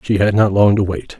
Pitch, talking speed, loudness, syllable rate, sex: 100 Hz, 300 wpm, -15 LUFS, 5.5 syllables/s, male